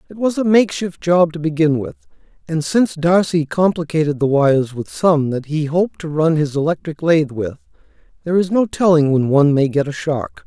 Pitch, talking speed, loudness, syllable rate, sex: 160 Hz, 200 wpm, -17 LUFS, 5.5 syllables/s, male